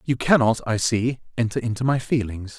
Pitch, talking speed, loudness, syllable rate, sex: 120 Hz, 185 wpm, -22 LUFS, 5.2 syllables/s, male